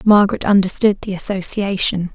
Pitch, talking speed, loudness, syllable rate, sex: 195 Hz, 110 wpm, -17 LUFS, 5.4 syllables/s, female